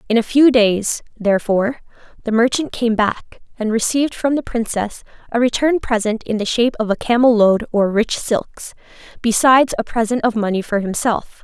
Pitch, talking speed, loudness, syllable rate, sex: 230 Hz, 180 wpm, -17 LUFS, 5.2 syllables/s, female